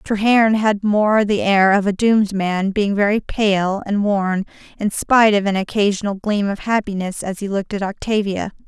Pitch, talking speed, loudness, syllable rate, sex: 205 Hz, 185 wpm, -18 LUFS, 4.9 syllables/s, female